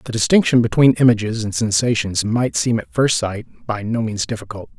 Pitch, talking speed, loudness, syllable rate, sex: 115 Hz, 190 wpm, -18 LUFS, 5.2 syllables/s, male